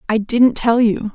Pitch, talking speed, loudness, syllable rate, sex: 225 Hz, 210 wpm, -15 LUFS, 4.1 syllables/s, female